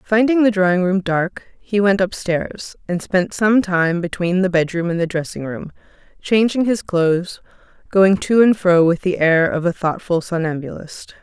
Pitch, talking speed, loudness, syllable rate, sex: 185 Hz, 175 wpm, -17 LUFS, 4.6 syllables/s, female